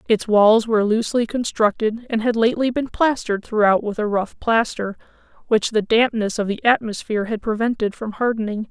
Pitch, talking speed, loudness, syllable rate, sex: 220 Hz, 170 wpm, -20 LUFS, 5.5 syllables/s, female